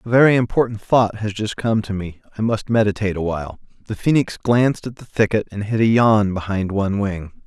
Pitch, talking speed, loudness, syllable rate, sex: 105 Hz, 215 wpm, -19 LUFS, 5.8 syllables/s, male